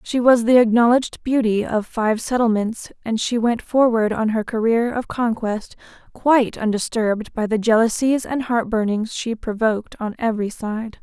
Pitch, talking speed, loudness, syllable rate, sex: 225 Hz, 165 wpm, -20 LUFS, 4.8 syllables/s, female